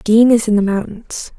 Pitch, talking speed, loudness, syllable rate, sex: 215 Hz, 215 wpm, -14 LUFS, 4.6 syllables/s, female